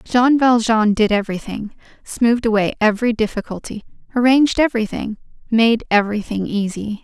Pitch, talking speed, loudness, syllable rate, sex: 225 Hz, 110 wpm, -17 LUFS, 5.7 syllables/s, female